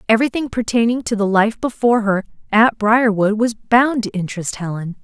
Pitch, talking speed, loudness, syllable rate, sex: 220 Hz, 165 wpm, -17 LUFS, 5.5 syllables/s, female